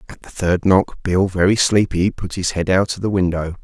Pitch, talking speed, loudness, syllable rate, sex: 95 Hz, 230 wpm, -18 LUFS, 5.2 syllables/s, male